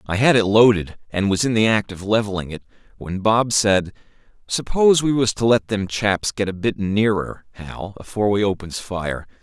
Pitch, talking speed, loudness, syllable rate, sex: 105 Hz, 195 wpm, -19 LUFS, 5.0 syllables/s, male